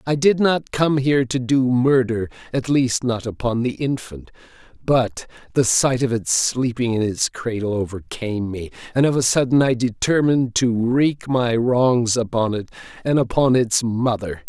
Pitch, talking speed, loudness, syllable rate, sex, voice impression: 125 Hz, 170 wpm, -20 LUFS, 4.5 syllables/s, male, masculine, slightly old, powerful, muffled, sincere, mature, friendly, reassuring, wild, kind